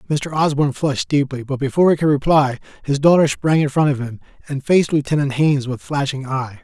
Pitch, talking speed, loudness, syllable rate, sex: 140 Hz, 210 wpm, -18 LUFS, 6.1 syllables/s, male